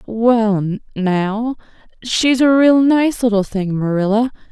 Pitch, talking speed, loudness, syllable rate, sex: 225 Hz, 120 wpm, -16 LUFS, 3.6 syllables/s, female